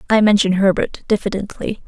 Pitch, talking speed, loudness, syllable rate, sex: 200 Hz, 130 wpm, -17 LUFS, 6.4 syllables/s, female